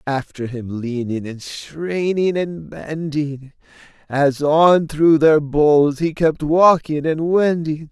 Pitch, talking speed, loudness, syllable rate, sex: 150 Hz, 130 wpm, -18 LUFS, 3.3 syllables/s, male